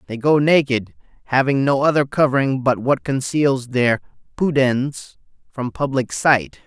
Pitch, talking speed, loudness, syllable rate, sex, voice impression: 135 Hz, 135 wpm, -18 LUFS, 4.3 syllables/s, male, masculine, adult-like, tensed, powerful, slightly bright, clear, slightly raspy, slightly mature, friendly, wild, lively, slightly strict, slightly intense